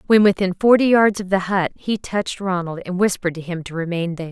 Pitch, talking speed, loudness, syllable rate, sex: 185 Hz, 235 wpm, -19 LUFS, 6.0 syllables/s, female